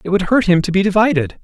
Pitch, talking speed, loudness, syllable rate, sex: 190 Hz, 295 wpm, -15 LUFS, 6.8 syllables/s, male